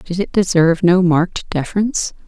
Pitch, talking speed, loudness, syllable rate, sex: 175 Hz, 160 wpm, -16 LUFS, 5.6 syllables/s, female